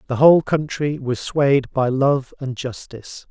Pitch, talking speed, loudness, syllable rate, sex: 135 Hz, 165 wpm, -19 LUFS, 4.2 syllables/s, male